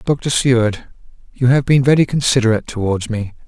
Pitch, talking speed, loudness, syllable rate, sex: 120 Hz, 155 wpm, -16 LUFS, 5.7 syllables/s, male